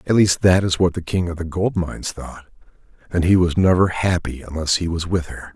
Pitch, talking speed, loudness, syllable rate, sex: 85 Hz, 240 wpm, -19 LUFS, 5.4 syllables/s, male